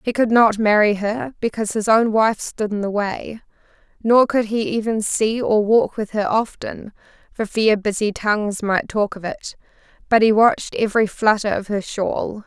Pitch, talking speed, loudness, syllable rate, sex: 215 Hz, 190 wpm, -19 LUFS, 4.7 syllables/s, female